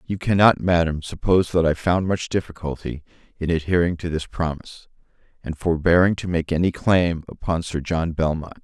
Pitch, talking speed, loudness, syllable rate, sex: 85 Hz, 165 wpm, -21 LUFS, 5.3 syllables/s, male